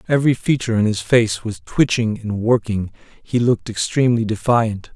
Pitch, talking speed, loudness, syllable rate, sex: 115 Hz, 160 wpm, -19 LUFS, 5.4 syllables/s, male